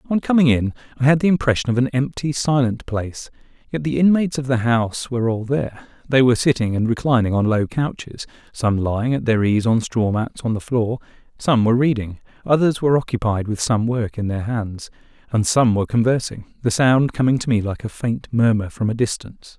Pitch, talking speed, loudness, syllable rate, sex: 120 Hz, 210 wpm, -19 LUFS, 5.8 syllables/s, male